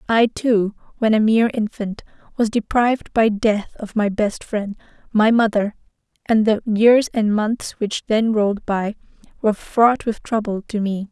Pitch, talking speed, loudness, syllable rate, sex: 215 Hz, 155 wpm, -19 LUFS, 4.4 syllables/s, female